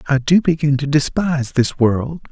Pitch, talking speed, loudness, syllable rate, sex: 145 Hz, 180 wpm, -17 LUFS, 4.9 syllables/s, male